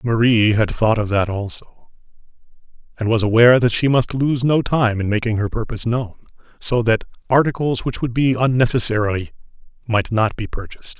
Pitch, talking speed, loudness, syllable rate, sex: 115 Hz, 170 wpm, -18 LUFS, 5.4 syllables/s, male